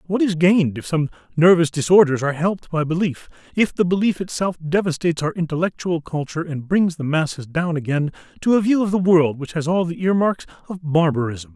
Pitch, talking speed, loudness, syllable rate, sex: 170 Hz, 195 wpm, -20 LUFS, 5.8 syllables/s, male